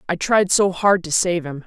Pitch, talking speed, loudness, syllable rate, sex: 180 Hz, 250 wpm, -18 LUFS, 4.7 syllables/s, female